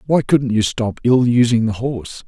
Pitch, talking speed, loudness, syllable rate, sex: 120 Hz, 210 wpm, -16 LUFS, 4.8 syllables/s, male